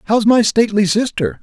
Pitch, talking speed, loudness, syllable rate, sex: 205 Hz, 170 wpm, -14 LUFS, 5.7 syllables/s, male